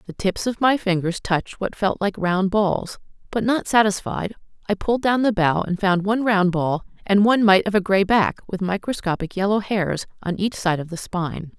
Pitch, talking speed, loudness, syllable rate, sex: 195 Hz, 210 wpm, -21 LUFS, 5.2 syllables/s, female